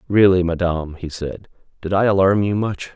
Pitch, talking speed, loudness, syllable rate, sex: 90 Hz, 185 wpm, -19 LUFS, 5.3 syllables/s, male